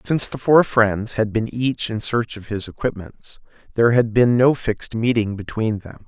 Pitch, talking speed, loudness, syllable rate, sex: 115 Hz, 200 wpm, -20 LUFS, 4.8 syllables/s, male